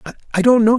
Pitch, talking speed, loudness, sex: 230 Hz, 230 wpm, -15 LUFS, male